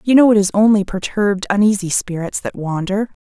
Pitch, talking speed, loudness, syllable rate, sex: 200 Hz, 185 wpm, -16 LUFS, 5.7 syllables/s, female